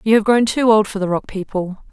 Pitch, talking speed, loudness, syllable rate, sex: 210 Hz, 280 wpm, -17 LUFS, 5.9 syllables/s, female